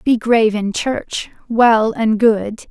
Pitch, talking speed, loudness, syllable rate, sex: 225 Hz, 155 wpm, -16 LUFS, 3.4 syllables/s, female